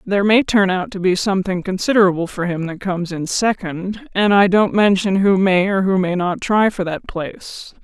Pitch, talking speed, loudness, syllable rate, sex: 190 Hz, 215 wpm, -17 LUFS, 5.1 syllables/s, female